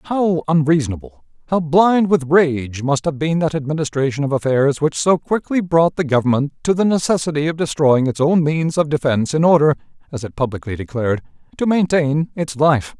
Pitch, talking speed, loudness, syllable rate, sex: 150 Hz, 180 wpm, -17 LUFS, 5.3 syllables/s, male